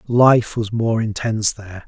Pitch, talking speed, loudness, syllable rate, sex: 110 Hz, 160 wpm, -18 LUFS, 4.7 syllables/s, male